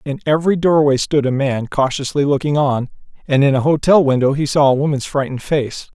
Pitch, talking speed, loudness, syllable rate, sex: 140 Hz, 200 wpm, -16 LUFS, 5.8 syllables/s, male